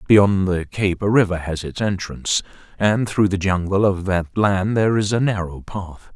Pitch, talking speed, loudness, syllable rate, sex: 95 Hz, 195 wpm, -20 LUFS, 4.7 syllables/s, male